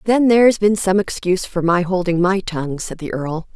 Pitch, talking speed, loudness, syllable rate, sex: 185 Hz, 220 wpm, -17 LUFS, 5.4 syllables/s, female